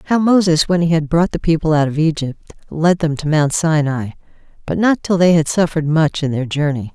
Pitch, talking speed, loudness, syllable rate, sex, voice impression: 160 Hz, 225 wpm, -16 LUFS, 5.4 syllables/s, female, feminine, adult-like, slightly powerful, hard, clear, fluent, intellectual, calm, elegant, slightly strict, sharp